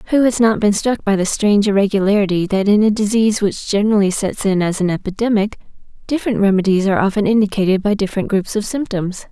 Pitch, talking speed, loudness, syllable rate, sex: 205 Hz, 195 wpm, -16 LUFS, 6.5 syllables/s, female